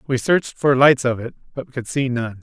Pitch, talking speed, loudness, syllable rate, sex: 130 Hz, 250 wpm, -19 LUFS, 5.3 syllables/s, male